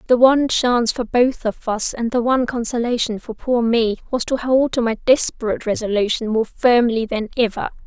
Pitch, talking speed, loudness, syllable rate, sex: 235 Hz, 190 wpm, -19 LUFS, 5.4 syllables/s, female